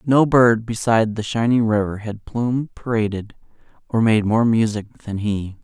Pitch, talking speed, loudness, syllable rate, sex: 110 Hz, 160 wpm, -19 LUFS, 4.6 syllables/s, male